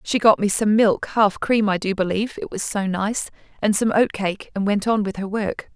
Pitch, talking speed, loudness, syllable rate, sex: 205 Hz, 220 wpm, -21 LUFS, 5.2 syllables/s, female